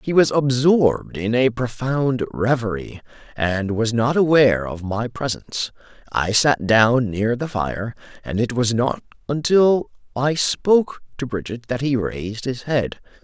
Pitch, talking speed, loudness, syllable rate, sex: 125 Hz, 155 wpm, -20 LUFS, 4.3 syllables/s, male